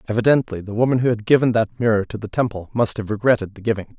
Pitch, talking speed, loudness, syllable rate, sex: 110 Hz, 240 wpm, -20 LUFS, 6.9 syllables/s, male